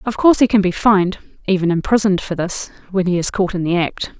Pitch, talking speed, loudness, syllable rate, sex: 190 Hz, 215 wpm, -17 LUFS, 6.4 syllables/s, female